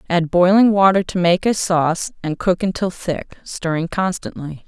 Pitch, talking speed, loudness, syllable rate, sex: 180 Hz, 165 wpm, -18 LUFS, 4.7 syllables/s, female